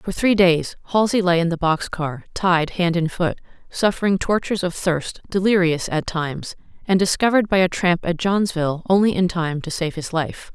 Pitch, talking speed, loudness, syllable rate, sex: 175 Hz, 195 wpm, -20 LUFS, 5.1 syllables/s, female